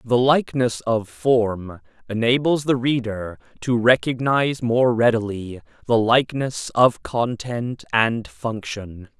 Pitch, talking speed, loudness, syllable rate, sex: 120 Hz, 110 wpm, -21 LUFS, 3.7 syllables/s, male